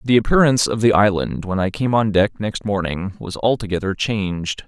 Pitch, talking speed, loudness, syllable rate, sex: 105 Hz, 195 wpm, -19 LUFS, 5.4 syllables/s, male